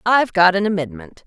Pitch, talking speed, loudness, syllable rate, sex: 180 Hz, 190 wpm, -16 LUFS, 6.0 syllables/s, female